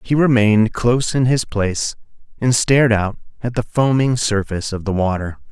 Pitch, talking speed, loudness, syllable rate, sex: 115 Hz, 175 wpm, -17 LUFS, 5.4 syllables/s, male